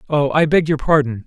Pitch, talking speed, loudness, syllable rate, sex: 145 Hz, 235 wpm, -16 LUFS, 5.5 syllables/s, male